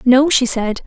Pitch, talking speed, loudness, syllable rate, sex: 255 Hz, 210 wpm, -14 LUFS, 4.0 syllables/s, female